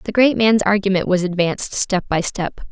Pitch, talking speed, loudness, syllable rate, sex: 195 Hz, 200 wpm, -18 LUFS, 5.1 syllables/s, female